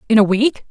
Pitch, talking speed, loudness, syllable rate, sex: 230 Hz, 255 wpm, -15 LUFS, 5.9 syllables/s, female